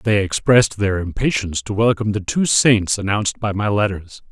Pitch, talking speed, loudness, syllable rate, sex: 105 Hz, 180 wpm, -18 LUFS, 5.5 syllables/s, male